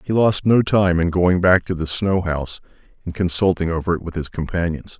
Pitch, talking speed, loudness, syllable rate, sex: 90 Hz, 215 wpm, -19 LUFS, 5.4 syllables/s, male